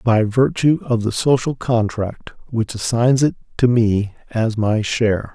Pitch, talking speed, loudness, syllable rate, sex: 115 Hz, 155 wpm, -18 LUFS, 3.8 syllables/s, male